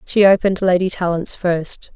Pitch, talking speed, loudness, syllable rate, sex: 180 Hz, 155 wpm, -17 LUFS, 4.9 syllables/s, female